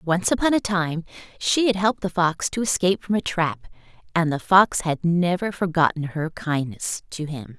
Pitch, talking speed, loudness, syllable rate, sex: 175 Hz, 190 wpm, -22 LUFS, 4.8 syllables/s, female